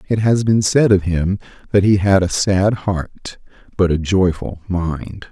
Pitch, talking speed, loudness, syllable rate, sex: 95 Hz, 180 wpm, -17 LUFS, 3.9 syllables/s, male